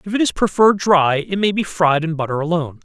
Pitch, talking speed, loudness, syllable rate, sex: 170 Hz, 255 wpm, -17 LUFS, 6.3 syllables/s, male